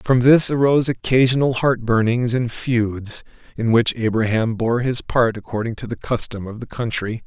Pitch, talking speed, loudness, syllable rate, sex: 120 Hz, 175 wpm, -19 LUFS, 4.8 syllables/s, male